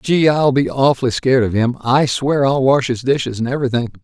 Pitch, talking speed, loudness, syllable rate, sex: 130 Hz, 225 wpm, -16 LUFS, 5.6 syllables/s, male